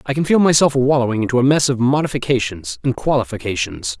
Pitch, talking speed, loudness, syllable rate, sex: 125 Hz, 180 wpm, -17 LUFS, 6.3 syllables/s, male